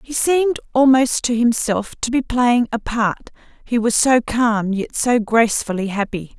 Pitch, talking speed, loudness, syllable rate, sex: 235 Hz, 170 wpm, -18 LUFS, 4.4 syllables/s, female